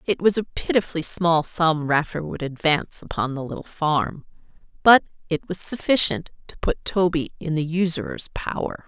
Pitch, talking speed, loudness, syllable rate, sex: 165 Hz, 160 wpm, -22 LUFS, 4.9 syllables/s, female